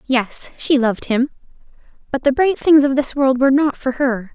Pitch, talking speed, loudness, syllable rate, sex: 270 Hz, 205 wpm, -17 LUFS, 5.1 syllables/s, female